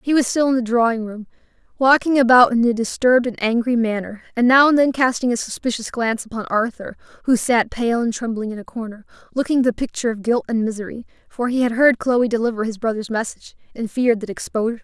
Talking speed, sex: 220 wpm, female